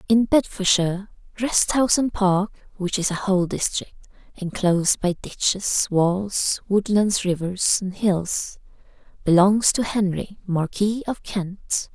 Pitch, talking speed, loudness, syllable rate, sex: 195 Hz, 125 wpm, -21 LUFS, 3.9 syllables/s, female